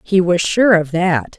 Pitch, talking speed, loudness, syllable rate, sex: 180 Hz, 215 wpm, -15 LUFS, 3.9 syllables/s, female